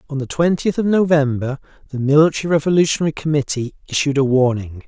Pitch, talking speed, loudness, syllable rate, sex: 145 Hz, 150 wpm, -17 LUFS, 6.4 syllables/s, male